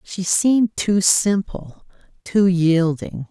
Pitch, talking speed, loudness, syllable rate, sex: 185 Hz, 110 wpm, -18 LUFS, 3.2 syllables/s, female